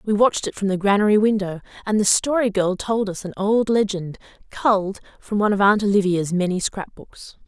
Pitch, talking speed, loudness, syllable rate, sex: 200 Hz, 195 wpm, -20 LUFS, 5.5 syllables/s, female